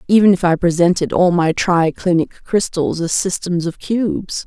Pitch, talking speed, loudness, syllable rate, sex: 175 Hz, 175 wpm, -16 LUFS, 4.7 syllables/s, female